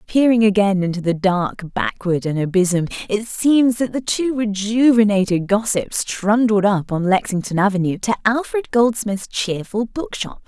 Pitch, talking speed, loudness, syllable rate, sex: 210 Hz, 145 wpm, -18 LUFS, 4.4 syllables/s, female